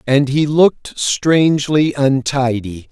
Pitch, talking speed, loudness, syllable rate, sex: 140 Hz, 105 wpm, -15 LUFS, 3.6 syllables/s, male